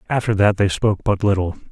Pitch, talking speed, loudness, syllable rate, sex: 100 Hz, 210 wpm, -18 LUFS, 6.4 syllables/s, male